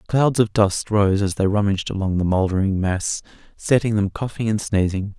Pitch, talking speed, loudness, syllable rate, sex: 100 Hz, 185 wpm, -20 LUFS, 5.1 syllables/s, male